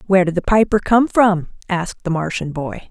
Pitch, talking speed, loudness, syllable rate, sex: 185 Hz, 205 wpm, -17 LUFS, 5.7 syllables/s, female